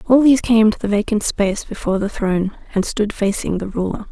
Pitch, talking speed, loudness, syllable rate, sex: 210 Hz, 220 wpm, -18 LUFS, 6.2 syllables/s, female